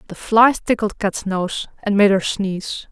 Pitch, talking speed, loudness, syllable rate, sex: 205 Hz, 185 wpm, -18 LUFS, 4.3 syllables/s, female